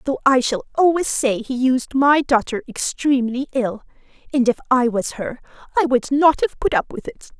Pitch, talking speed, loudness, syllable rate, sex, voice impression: 260 Hz, 195 wpm, -19 LUFS, 4.9 syllables/s, female, feminine, adult-like, tensed, slightly powerful, bright, slightly soft, slightly muffled, raspy, intellectual, slightly friendly, elegant, lively, sharp